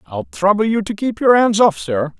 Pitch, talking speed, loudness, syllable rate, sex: 185 Hz, 245 wpm, -16 LUFS, 4.9 syllables/s, male